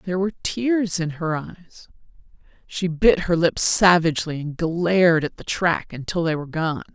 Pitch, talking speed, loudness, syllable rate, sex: 170 Hz, 165 wpm, -21 LUFS, 4.7 syllables/s, female